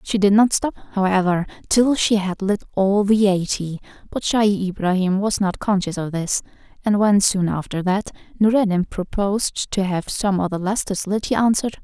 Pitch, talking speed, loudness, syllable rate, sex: 200 Hz, 180 wpm, -20 LUFS, 4.9 syllables/s, female